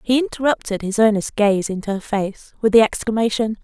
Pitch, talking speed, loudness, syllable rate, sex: 215 Hz, 180 wpm, -19 LUFS, 5.6 syllables/s, female